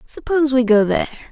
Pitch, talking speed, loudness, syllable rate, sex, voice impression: 255 Hz, 185 wpm, -17 LUFS, 7.0 syllables/s, female, feminine, adult-like, tensed, powerful, clear, intellectual, calm, friendly, slightly elegant, lively, sharp